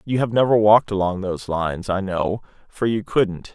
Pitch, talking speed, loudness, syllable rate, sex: 100 Hz, 205 wpm, -20 LUFS, 5.3 syllables/s, male